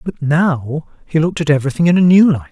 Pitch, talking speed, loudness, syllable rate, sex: 155 Hz, 240 wpm, -14 LUFS, 6.2 syllables/s, male